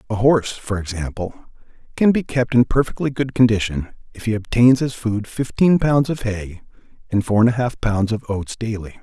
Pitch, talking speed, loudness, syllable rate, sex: 115 Hz, 195 wpm, -19 LUFS, 5.1 syllables/s, male